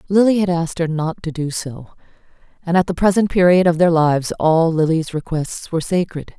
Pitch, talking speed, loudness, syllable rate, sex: 170 Hz, 195 wpm, -17 LUFS, 5.3 syllables/s, female